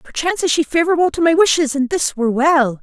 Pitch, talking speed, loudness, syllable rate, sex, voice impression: 300 Hz, 235 wpm, -16 LUFS, 6.6 syllables/s, female, feminine, very adult-like, intellectual, slightly sharp